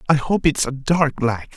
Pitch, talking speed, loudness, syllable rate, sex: 145 Hz, 230 wpm, -19 LUFS, 4.5 syllables/s, male